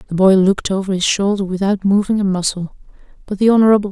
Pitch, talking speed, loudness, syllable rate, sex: 195 Hz, 200 wpm, -15 LUFS, 6.8 syllables/s, female